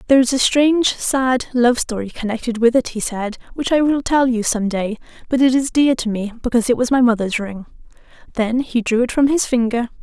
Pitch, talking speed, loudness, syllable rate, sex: 240 Hz, 225 wpm, -17 LUFS, 5.6 syllables/s, female